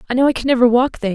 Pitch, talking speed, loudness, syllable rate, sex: 245 Hz, 370 wpm, -15 LUFS, 9.0 syllables/s, female